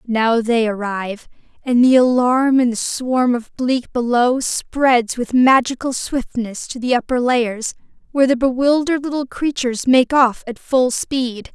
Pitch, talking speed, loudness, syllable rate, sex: 250 Hz, 155 wpm, -17 LUFS, 4.2 syllables/s, female